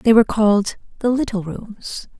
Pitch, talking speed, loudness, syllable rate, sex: 215 Hz, 165 wpm, -19 LUFS, 4.9 syllables/s, female